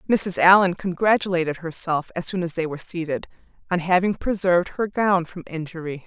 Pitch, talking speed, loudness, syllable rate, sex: 175 Hz, 170 wpm, -22 LUFS, 5.6 syllables/s, female